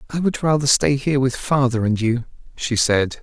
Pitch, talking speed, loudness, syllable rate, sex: 130 Hz, 205 wpm, -19 LUFS, 5.2 syllables/s, male